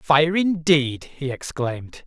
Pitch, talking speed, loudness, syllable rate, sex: 150 Hz, 115 wpm, -21 LUFS, 3.5 syllables/s, male